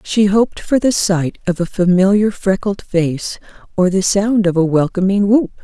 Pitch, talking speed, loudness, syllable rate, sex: 195 Hz, 180 wpm, -15 LUFS, 4.6 syllables/s, female